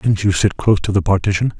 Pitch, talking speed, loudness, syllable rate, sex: 100 Hz, 265 wpm, -16 LUFS, 6.6 syllables/s, male